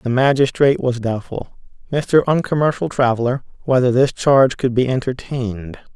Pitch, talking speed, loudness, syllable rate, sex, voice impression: 130 Hz, 130 wpm, -17 LUFS, 5.2 syllables/s, male, very masculine, very adult-like, very middle-aged, very thick, slightly relaxed, slightly weak, slightly dark, slightly soft, muffled, slightly halting, slightly raspy, cool, intellectual, slightly refreshing, sincere, calm, very mature, friendly, very reassuring, wild, slightly sweet, kind, modest